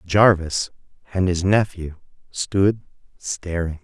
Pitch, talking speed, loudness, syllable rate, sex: 90 Hz, 95 wpm, -21 LUFS, 3.5 syllables/s, male